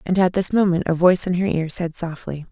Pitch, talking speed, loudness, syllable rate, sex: 175 Hz, 260 wpm, -19 LUFS, 5.9 syllables/s, female